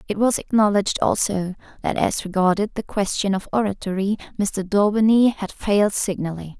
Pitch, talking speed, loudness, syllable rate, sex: 200 Hz, 145 wpm, -21 LUFS, 5.3 syllables/s, female